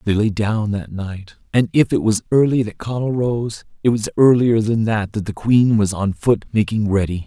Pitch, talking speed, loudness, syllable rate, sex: 110 Hz, 215 wpm, -18 LUFS, 4.7 syllables/s, male